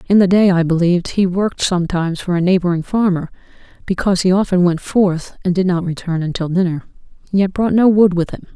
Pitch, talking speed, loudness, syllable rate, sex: 180 Hz, 205 wpm, -16 LUFS, 6.2 syllables/s, female